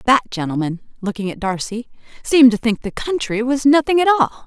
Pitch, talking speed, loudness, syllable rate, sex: 240 Hz, 200 wpm, -17 LUFS, 6.3 syllables/s, female